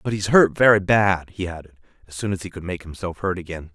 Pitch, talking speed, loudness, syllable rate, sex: 95 Hz, 255 wpm, -21 LUFS, 6.1 syllables/s, male